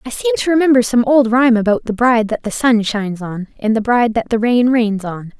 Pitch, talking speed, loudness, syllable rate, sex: 235 Hz, 255 wpm, -15 LUFS, 5.9 syllables/s, female